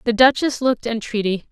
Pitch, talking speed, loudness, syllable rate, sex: 235 Hz, 160 wpm, -19 LUFS, 5.8 syllables/s, female